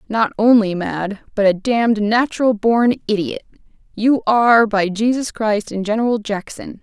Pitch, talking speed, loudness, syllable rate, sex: 220 Hz, 150 wpm, -17 LUFS, 4.5 syllables/s, female